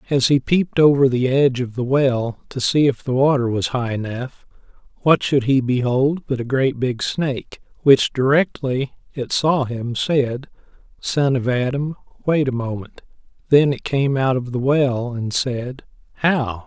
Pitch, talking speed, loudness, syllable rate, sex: 130 Hz, 175 wpm, -19 LUFS, 4.3 syllables/s, male